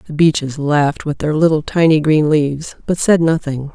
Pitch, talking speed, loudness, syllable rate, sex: 155 Hz, 190 wpm, -15 LUFS, 5.1 syllables/s, female